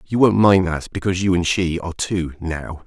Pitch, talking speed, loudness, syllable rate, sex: 90 Hz, 230 wpm, -19 LUFS, 5.3 syllables/s, male